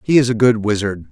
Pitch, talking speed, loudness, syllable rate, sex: 115 Hz, 270 wpm, -16 LUFS, 5.9 syllables/s, male